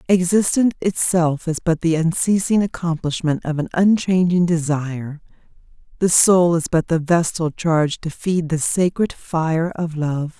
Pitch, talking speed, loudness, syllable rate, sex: 170 Hz, 145 wpm, -19 LUFS, 4.5 syllables/s, female